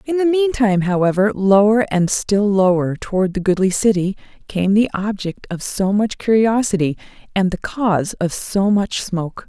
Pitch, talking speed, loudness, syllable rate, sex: 200 Hz, 165 wpm, -17 LUFS, 4.8 syllables/s, female